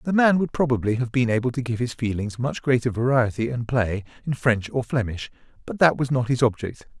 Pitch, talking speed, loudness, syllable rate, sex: 125 Hz, 225 wpm, -23 LUFS, 5.6 syllables/s, male